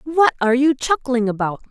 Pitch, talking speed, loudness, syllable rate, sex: 260 Hz, 175 wpm, -18 LUFS, 5.5 syllables/s, female